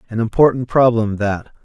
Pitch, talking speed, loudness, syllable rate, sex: 115 Hz, 145 wpm, -16 LUFS, 5.1 syllables/s, male